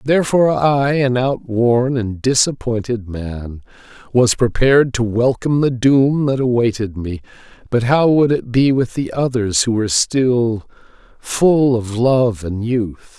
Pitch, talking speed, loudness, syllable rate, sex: 120 Hz, 145 wpm, -16 LUFS, 4.1 syllables/s, male